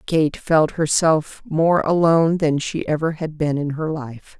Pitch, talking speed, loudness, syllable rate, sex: 155 Hz, 180 wpm, -19 LUFS, 4.0 syllables/s, female